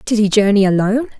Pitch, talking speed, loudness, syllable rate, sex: 210 Hz, 200 wpm, -14 LUFS, 7.1 syllables/s, female